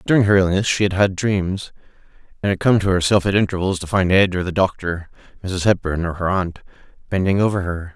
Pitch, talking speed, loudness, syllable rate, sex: 95 Hz, 210 wpm, -19 LUFS, 5.9 syllables/s, male